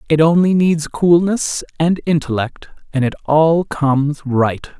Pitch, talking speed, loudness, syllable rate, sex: 155 Hz, 140 wpm, -16 LUFS, 4.1 syllables/s, male